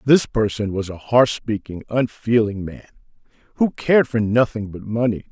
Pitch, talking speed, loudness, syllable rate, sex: 110 Hz, 160 wpm, -20 LUFS, 4.8 syllables/s, male